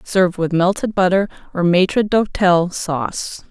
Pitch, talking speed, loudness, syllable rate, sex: 185 Hz, 135 wpm, -17 LUFS, 4.5 syllables/s, female